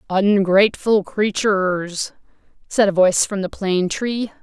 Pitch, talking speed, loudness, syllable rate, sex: 195 Hz, 120 wpm, -18 LUFS, 4.4 syllables/s, female